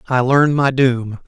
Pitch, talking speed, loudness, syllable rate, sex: 130 Hz, 190 wpm, -15 LUFS, 3.6 syllables/s, male